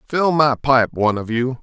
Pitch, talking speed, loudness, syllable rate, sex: 130 Hz, 220 wpm, -17 LUFS, 4.9 syllables/s, male